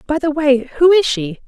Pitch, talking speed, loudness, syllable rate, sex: 290 Hz, 245 wpm, -15 LUFS, 4.7 syllables/s, female